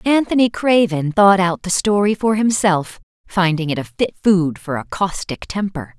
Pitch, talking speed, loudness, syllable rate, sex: 185 Hz, 170 wpm, -17 LUFS, 4.5 syllables/s, female